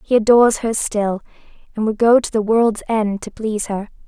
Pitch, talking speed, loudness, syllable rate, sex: 220 Hz, 205 wpm, -17 LUFS, 5.2 syllables/s, female